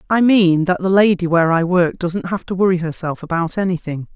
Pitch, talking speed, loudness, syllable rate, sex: 175 Hz, 215 wpm, -17 LUFS, 5.6 syllables/s, female